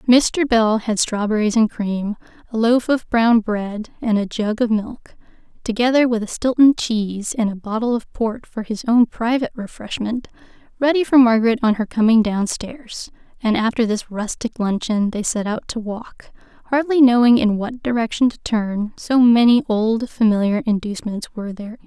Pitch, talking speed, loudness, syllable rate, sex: 225 Hz, 180 wpm, -18 LUFS, 3.8 syllables/s, female